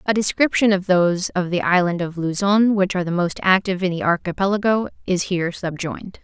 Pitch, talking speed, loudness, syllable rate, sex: 185 Hz, 200 wpm, -20 LUFS, 6.0 syllables/s, female